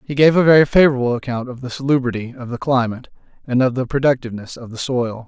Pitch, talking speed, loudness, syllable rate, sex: 125 Hz, 215 wpm, -17 LUFS, 6.9 syllables/s, male